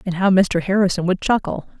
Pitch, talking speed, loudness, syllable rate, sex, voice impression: 185 Hz, 200 wpm, -18 LUFS, 5.6 syllables/s, female, feminine, adult-like, tensed, powerful, clear, fluent, intellectual, calm, elegant, strict, sharp